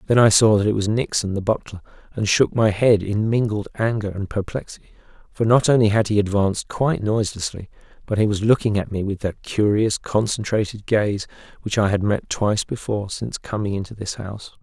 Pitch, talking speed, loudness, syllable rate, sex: 105 Hz, 195 wpm, -21 LUFS, 5.8 syllables/s, male